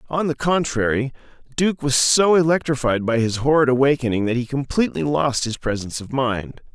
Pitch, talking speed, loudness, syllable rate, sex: 135 Hz, 170 wpm, -20 LUFS, 5.5 syllables/s, male